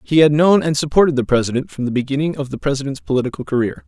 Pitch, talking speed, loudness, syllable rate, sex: 140 Hz, 235 wpm, -17 LUFS, 7.2 syllables/s, male